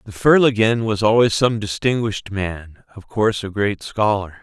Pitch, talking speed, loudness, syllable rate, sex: 105 Hz, 165 wpm, -18 LUFS, 4.8 syllables/s, male